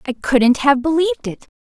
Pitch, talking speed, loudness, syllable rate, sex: 285 Hz, 185 wpm, -16 LUFS, 5.2 syllables/s, female